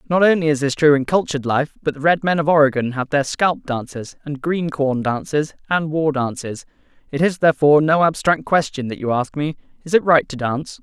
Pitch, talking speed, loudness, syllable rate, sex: 150 Hz, 215 wpm, -18 LUFS, 5.6 syllables/s, male